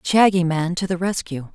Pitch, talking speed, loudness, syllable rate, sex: 175 Hz, 195 wpm, -20 LUFS, 4.9 syllables/s, female